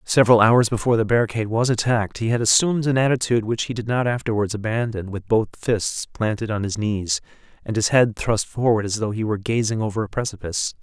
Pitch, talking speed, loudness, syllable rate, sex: 110 Hz, 210 wpm, -21 LUFS, 6.3 syllables/s, male